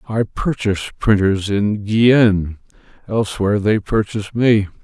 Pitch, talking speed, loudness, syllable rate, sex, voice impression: 105 Hz, 110 wpm, -17 LUFS, 4.8 syllables/s, male, very masculine, old, thick, slightly muffled, very calm, slightly mature, slightly wild